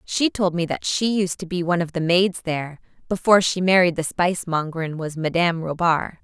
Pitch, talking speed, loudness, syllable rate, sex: 175 Hz, 220 wpm, -21 LUFS, 5.7 syllables/s, female